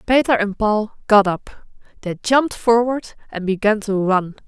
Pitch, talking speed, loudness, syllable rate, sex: 215 Hz, 160 wpm, -18 LUFS, 4.4 syllables/s, female